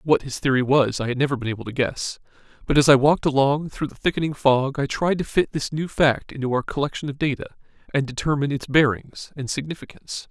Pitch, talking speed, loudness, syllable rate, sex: 140 Hz, 220 wpm, -22 LUFS, 6.1 syllables/s, male